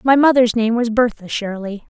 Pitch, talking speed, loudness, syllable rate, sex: 230 Hz, 180 wpm, -17 LUFS, 5.0 syllables/s, female